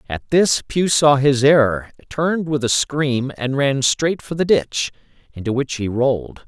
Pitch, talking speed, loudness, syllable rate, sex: 140 Hz, 185 wpm, -18 LUFS, 4.4 syllables/s, male